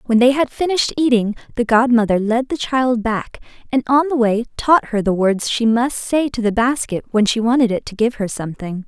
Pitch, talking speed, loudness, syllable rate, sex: 235 Hz, 225 wpm, -17 LUFS, 5.4 syllables/s, female